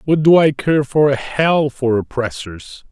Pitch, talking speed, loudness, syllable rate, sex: 135 Hz, 185 wpm, -15 LUFS, 4.0 syllables/s, male